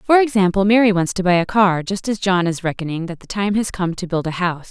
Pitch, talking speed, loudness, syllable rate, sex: 190 Hz, 280 wpm, -18 LUFS, 6.0 syllables/s, female